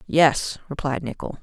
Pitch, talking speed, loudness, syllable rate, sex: 145 Hz, 125 wpm, -23 LUFS, 4.3 syllables/s, female